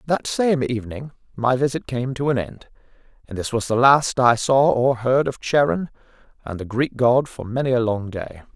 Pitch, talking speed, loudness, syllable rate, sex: 125 Hz, 205 wpm, -20 LUFS, 4.8 syllables/s, male